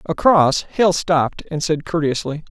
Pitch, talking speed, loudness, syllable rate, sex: 160 Hz, 140 wpm, -18 LUFS, 4.4 syllables/s, male